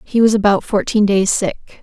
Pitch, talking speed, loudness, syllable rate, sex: 205 Hz, 195 wpm, -15 LUFS, 4.6 syllables/s, female